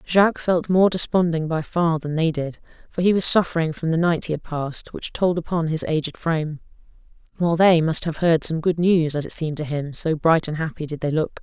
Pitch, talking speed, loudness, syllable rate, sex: 160 Hz, 235 wpm, -21 LUFS, 5.6 syllables/s, female